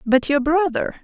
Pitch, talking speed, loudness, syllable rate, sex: 295 Hz, 175 wpm, -19 LUFS, 4.6 syllables/s, female